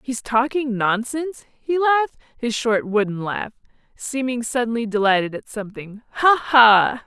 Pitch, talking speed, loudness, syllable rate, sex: 240 Hz, 125 wpm, -20 LUFS, 4.6 syllables/s, female